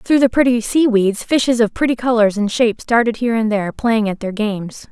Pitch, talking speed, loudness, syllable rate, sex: 225 Hz, 230 wpm, -16 LUFS, 5.8 syllables/s, female